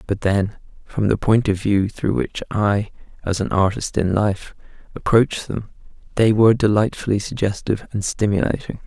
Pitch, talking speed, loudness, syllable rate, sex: 105 Hz, 155 wpm, -20 LUFS, 4.9 syllables/s, male